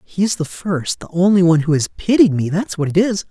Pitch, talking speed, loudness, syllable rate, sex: 180 Hz, 270 wpm, -16 LUFS, 5.7 syllables/s, male